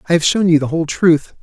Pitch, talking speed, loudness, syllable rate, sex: 165 Hz, 295 wpm, -15 LUFS, 6.6 syllables/s, male